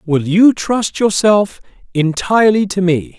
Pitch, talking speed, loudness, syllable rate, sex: 190 Hz, 130 wpm, -14 LUFS, 4.0 syllables/s, male